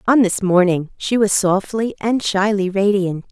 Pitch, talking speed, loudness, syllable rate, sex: 200 Hz, 165 wpm, -17 LUFS, 4.3 syllables/s, female